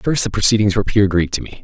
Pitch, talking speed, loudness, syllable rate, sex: 105 Hz, 330 wpm, -16 LUFS, 7.6 syllables/s, male